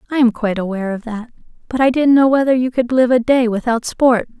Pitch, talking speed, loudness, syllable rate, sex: 245 Hz, 245 wpm, -15 LUFS, 6.2 syllables/s, female